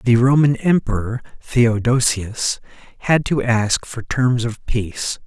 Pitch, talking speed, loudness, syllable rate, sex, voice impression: 120 Hz, 125 wpm, -18 LUFS, 3.8 syllables/s, male, masculine, very adult-like, cool, slightly refreshing, calm, friendly, slightly kind